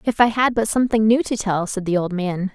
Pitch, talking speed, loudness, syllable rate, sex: 210 Hz, 285 wpm, -19 LUFS, 5.7 syllables/s, female